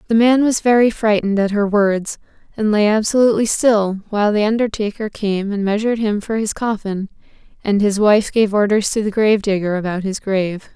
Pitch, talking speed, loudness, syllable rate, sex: 210 Hz, 185 wpm, -17 LUFS, 5.5 syllables/s, female